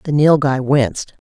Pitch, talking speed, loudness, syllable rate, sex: 140 Hz, 140 wpm, -15 LUFS, 4.8 syllables/s, female